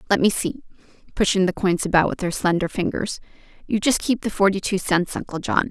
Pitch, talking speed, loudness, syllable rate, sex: 195 Hz, 210 wpm, -21 LUFS, 5.8 syllables/s, female